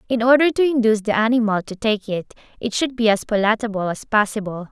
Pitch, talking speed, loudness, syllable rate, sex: 220 Hz, 205 wpm, -19 LUFS, 6.1 syllables/s, female